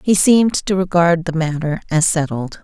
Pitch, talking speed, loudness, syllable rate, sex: 170 Hz, 180 wpm, -16 LUFS, 5.0 syllables/s, female